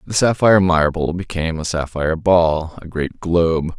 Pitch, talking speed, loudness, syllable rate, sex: 85 Hz, 160 wpm, -18 LUFS, 5.0 syllables/s, male